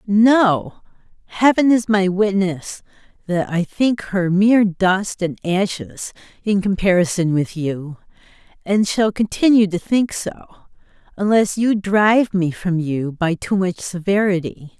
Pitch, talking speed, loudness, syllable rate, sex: 195 Hz, 135 wpm, -18 LUFS, 4.0 syllables/s, female